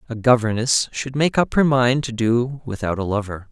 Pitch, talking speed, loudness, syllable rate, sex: 120 Hz, 205 wpm, -20 LUFS, 4.9 syllables/s, male